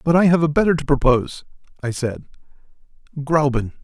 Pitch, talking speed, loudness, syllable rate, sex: 150 Hz, 155 wpm, -19 LUFS, 5.9 syllables/s, male